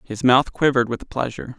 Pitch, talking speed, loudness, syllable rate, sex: 125 Hz, 190 wpm, -20 LUFS, 6.0 syllables/s, male